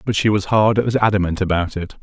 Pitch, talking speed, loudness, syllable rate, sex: 100 Hz, 235 wpm, -18 LUFS, 5.9 syllables/s, male